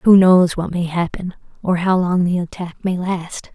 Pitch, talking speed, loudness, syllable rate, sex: 180 Hz, 205 wpm, -18 LUFS, 4.3 syllables/s, female